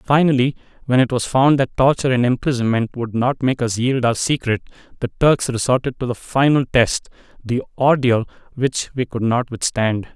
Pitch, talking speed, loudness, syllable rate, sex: 125 Hz, 170 wpm, -18 LUFS, 5.1 syllables/s, male